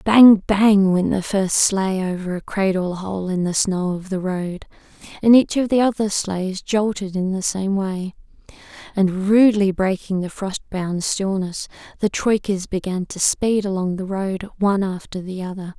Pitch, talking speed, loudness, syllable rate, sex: 195 Hz, 175 wpm, -20 LUFS, 4.4 syllables/s, female